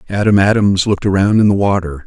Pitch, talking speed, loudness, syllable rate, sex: 100 Hz, 205 wpm, -13 LUFS, 6.4 syllables/s, male